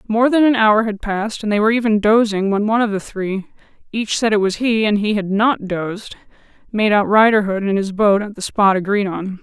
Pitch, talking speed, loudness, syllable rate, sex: 210 Hz, 225 wpm, -17 LUFS, 5.6 syllables/s, female